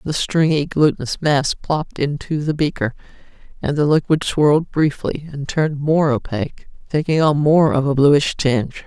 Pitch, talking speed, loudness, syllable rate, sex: 145 Hz, 160 wpm, -18 LUFS, 4.9 syllables/s, female